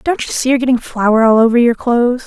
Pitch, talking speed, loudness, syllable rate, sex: 240 Hz, 265 wpm, -13 LUFS, 6.5 syllables/s, female